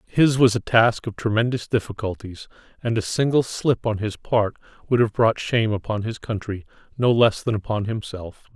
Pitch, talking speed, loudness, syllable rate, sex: 110 Hz, 180 wpm, -22 LUFS, 5.1 syllables/s, male